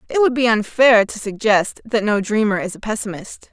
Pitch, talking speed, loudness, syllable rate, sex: 220 Hz, 205 wpm, -17 LUFS, 5.2 syllables/s, female